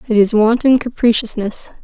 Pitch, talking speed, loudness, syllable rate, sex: 225 Hz, 130 wpm, -15 LUFS, 5.2 syllables/s, female